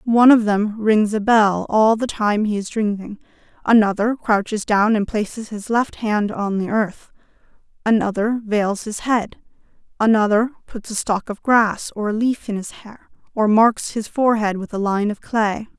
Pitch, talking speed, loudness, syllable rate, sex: 215 Hz, 180 wpm, -19 LUFS, 4.5 syllables/s, female